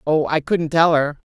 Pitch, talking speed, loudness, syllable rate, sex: 155 Hz, 230 wpm, -18 LUFS, 4.5 syllables/s, female